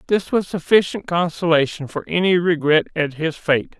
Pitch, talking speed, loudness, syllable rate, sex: 170 Hz, 160 wpm, -19 LUFS, 4.9 syllables/s, male